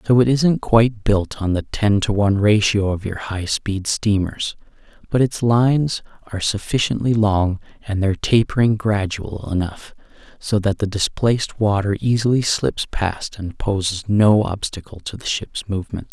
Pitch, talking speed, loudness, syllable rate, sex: 105 Hz, 155 wpm, -19 LUFS, 4.6 syllables/s, male